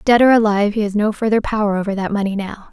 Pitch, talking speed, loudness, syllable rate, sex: 210 Hz, 265 wpm, -17 LUFS, 6.9 syllables/s, female